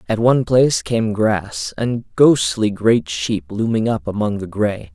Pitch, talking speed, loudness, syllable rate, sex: 110 Hz, 170 wpm, -18 LUFS, 4.1 syllables/s, male